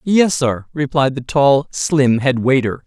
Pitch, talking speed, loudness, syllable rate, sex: 135 Hz, 170 wpm, -16 LUFS, 3.8 syllables/s, male